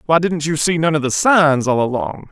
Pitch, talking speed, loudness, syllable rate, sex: 155 Hz, 260 wpm, -16 LUFS, 5.1 syllables/s, male